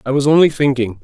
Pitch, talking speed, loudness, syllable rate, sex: 135 Hz, 230 wpm, -14 LUFS, 6.5 syllables/s, male